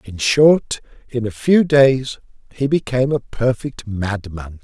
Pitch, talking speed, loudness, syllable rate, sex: 125 Hz, 155 wpm, -17 LUFS, 3.8 syllables/s, male